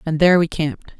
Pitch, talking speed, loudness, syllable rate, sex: 160 Hz, 240 wpm, -18 LUFS, 7.3 syllables/s, female